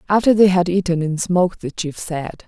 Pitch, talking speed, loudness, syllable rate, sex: 175 Hz, 220 wpm, -18 LUFS, 5.2 syllables/s, female